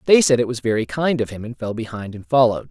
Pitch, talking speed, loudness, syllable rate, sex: 120 Hz, 290 wpm, -20 LUFS, 6.7 syllables/s, male